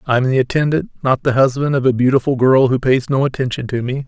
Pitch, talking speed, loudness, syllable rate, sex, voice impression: 130 Hz, 250 wpm, -16 LUFS, 6.3 syllables/s, male, masculine, middle-aged, thick, cool, slightly intellectual, slightly calm